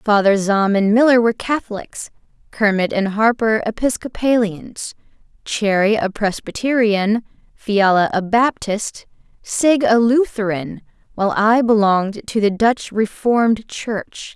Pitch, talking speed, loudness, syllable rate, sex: 215 Hz, 115 wpm, -17 LUFS, 4.1 syllables/s, female